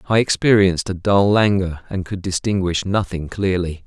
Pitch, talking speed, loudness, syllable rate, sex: 95 Hz, 155 wpm, -18 LUFS, 5.0 syllables/s, male